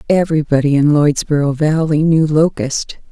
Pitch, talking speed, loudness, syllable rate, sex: 150 Hz, 115 wpm, -14 LUFS, 4.9 syllables/s, female